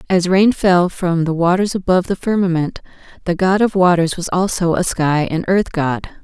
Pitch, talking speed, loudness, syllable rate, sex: 180 Hz, 190 wpm, -16 LUFS, 4.9 syllables/s, female